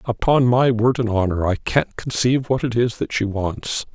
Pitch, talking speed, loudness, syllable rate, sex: 115 Hz, 215 wpm, -20 LUFS, 4.8 syllables/s, male